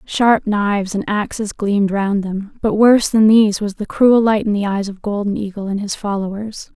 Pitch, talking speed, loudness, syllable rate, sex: 205 Hz, 210 wpm, -17 LUFS, 5.0 syllables/s, female